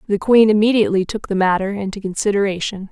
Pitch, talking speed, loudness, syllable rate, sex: 205 Hz, 165 wpm, -17 LUFS, 6.6 syllables/s, female